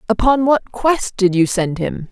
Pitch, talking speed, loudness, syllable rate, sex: 215 Hz, 200 wpm, -16 LUFS, 4.2 syllables/s, female